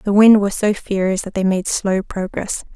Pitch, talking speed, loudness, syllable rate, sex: 200 Hz, 220 wpm, -17 LUFS, 4.6 syllables/s, female